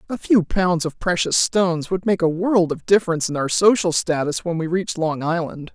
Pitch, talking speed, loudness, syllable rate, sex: 175 Hz, 220 wpm, -20 LUFS, 5.2 syllables/s, female